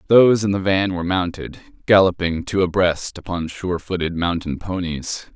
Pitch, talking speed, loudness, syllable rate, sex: 90 Hz, 155 wpm, -20 LUFS, 5.0 syllables/s, male